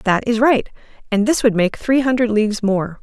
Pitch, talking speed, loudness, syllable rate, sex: 225 Hz, 220 wpm, -17 LUFS, 5.0 syllables/s, female